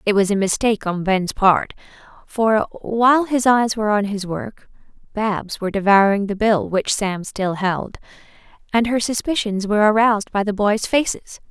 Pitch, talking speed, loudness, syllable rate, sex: 210 Hz, 170 wpm, -19 LUFS, 4.8 syllables/s, female